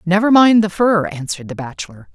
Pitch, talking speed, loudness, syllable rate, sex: 180 Hz, 195 wpm, -15 LUFS, 5.9 syllables/s, female